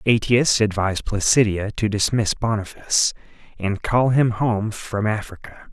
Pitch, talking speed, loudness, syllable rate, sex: 110 Hz, 125 wpm, -20 LUFS, 4.5 syllables/s, male